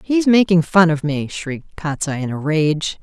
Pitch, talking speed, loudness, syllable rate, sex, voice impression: 165 Hz, 220 wpm, -17 LUFS, 4.9 syllables/s, female, very feminine, very adult-like, middle-aged, thin, tensed, slightly powerful, slightly bright, soft, very clear, fluent, cute, very intellectual, refreshing, sincere, very calm, very friendly, very reassuring, very unique, very elegant, very sweet, lively, very kind, slightly modest